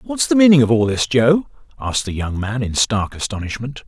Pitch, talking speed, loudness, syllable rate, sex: 125 Hz, 215 wpm, -17 LUFS, 5.2 syllables/s, male